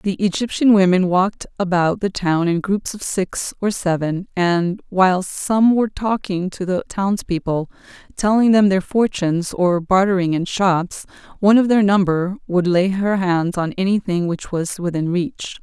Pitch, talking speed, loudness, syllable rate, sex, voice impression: 190 Hz, 165 wpm, -18 LUFS, 4.4 syllables/s, female, feminine, adult-like, tensed, powerful, slightly hard, clear, intellectual, calm, reassuring, elegant, lively, slightly sharp